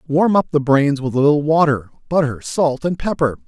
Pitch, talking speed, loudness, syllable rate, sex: 145 Hz, 205 wpm, -17 LUFS, 5.3 syllables/s, male